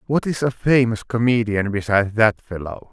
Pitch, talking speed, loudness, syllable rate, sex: 115 Hz, 165 wpm, -19 LUFS, 5.1 syllables/s, male